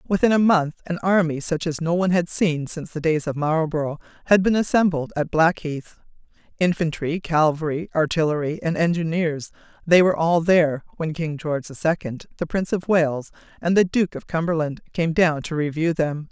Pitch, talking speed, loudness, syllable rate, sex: 165 Hz, 180 wpm, -21 LUFS, 5.3 syllables/s, female